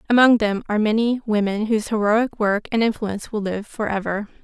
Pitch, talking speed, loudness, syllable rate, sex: 215 Hz, 175 wpm, -21 LUFS, 5.8 syllables/s, female